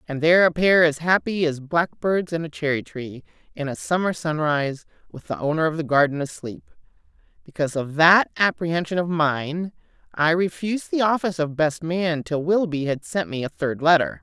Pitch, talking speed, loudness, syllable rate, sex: 160 Hz, 185 wpm, -22 LUFS, 5.3 syllables/s, female